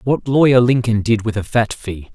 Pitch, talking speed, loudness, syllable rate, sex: 115 Hz, 225 wpm, -16 LUFS, 4.9 syllables/s, male